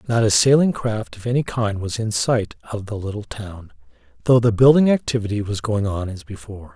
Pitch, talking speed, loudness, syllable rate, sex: 110 Hz, 205 wpm, -19 LUFS, 5.4 syllables/s, male